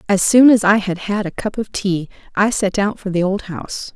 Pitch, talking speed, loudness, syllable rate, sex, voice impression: 200 Hz, 260 wpm, -17 LUFS, 5.1 syllables/s, female, feminine, adult-like, calm, slightly friendly, slightly sweet